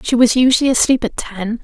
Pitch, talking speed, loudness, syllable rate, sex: 240 Hz, 220 wpm, -14 LUFS, 5.9 syllables/s, female